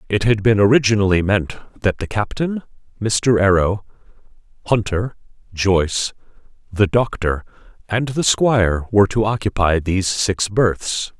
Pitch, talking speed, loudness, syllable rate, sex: 105 Hz, 125 wpm, -18 LUFS, 4.5 syllables/s, male